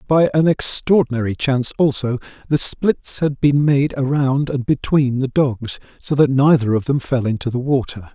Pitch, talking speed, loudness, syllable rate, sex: 135 Hz, 175 wpm, -18 LUFS, 4.8 syllables/s, male